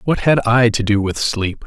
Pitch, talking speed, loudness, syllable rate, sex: 115 Hz, 255 wpm, -16 LUFS, 4.3 syllables/s, male